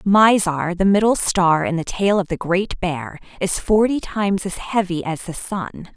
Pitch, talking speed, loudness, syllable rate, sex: 185 Hz, 190 wpm, -19 LUFS, 4.3 syllables/s, female